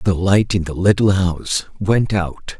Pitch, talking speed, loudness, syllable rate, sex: 95 Hz, 185 wpm, -18 LUFS, 4.1 syllables/s, male